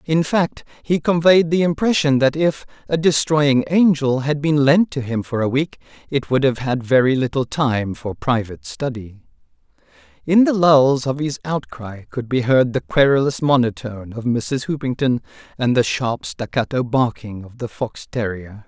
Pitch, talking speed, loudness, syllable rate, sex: 135 Hz, 170 wpm, -18 LUFS, 4.6 syllables/s, male